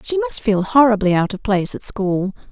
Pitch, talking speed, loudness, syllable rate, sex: 220 Hz, 215 wpm, -18 LUFS, 5.9 syllables/s, female